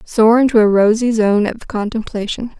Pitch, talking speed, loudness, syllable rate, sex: 220 Hz, 160 wpm, -15 LUFS, 4.8 syllables/s, female